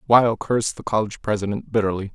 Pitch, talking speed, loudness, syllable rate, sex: 105 Hz, 170 wpm, -22 LUFS, 6.5 syllables/s, male